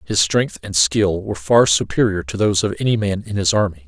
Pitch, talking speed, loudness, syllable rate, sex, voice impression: 95 Hz, 230 wpm, -18 LUFS, 5.7 syllables/s, male, masculine, adult-like, tensed, powerful, hard, clear, raspy, calm, mature, reassuring, wild, lively, strict